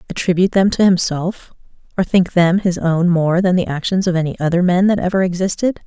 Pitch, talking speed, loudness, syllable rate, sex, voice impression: 180 Hz, 205 wpm, -16 LUFS, 5.8 syllables/s, female, feminine, adult-like, slightly clear, slightly fluent, sincere, slightly calm